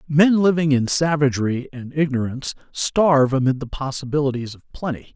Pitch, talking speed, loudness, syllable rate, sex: 140 Hz, 140 wpm, -20 LUFS, 5.5 syllables/s, male